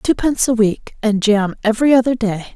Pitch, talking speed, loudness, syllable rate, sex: 225 Hz, 190 wpm, -16 LUFS, 5.7 syllables/s, female